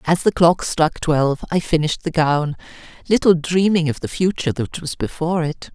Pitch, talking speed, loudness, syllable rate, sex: 160 Hz, 190 wpm, -19 LUFS, 5.4 syllables/s, female